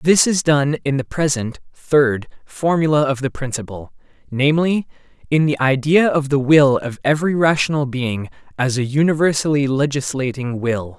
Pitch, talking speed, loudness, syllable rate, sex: 140 Hz, 150 wpm, -18 LUFS, 5.1 syllables/s, male